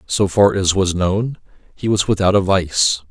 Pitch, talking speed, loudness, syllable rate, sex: 95 Hz, 195 wpm, -17 LUFS, 4.2 syllables/s, male